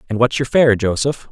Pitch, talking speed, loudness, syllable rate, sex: 120 Hz, 230 wpm, -16 LUFS, 5.3 syllables/s, male